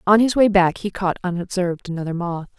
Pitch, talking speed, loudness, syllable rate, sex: 185 Hz, 210 wpm, -20 LUFS, 6.1 syllables/s, female